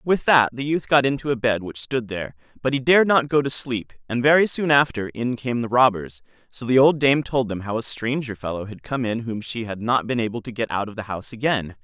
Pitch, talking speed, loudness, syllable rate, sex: 120 Hz, 265 wpm, -21 LUFS, 5.7 syllables/s, male